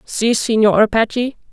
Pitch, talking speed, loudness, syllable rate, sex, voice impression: 225 Hz, 120 wpm, -15 LUFS, 4.6 syllables/s, male, masculine, very adult-like, slightly calm, slightly unique, slightly kind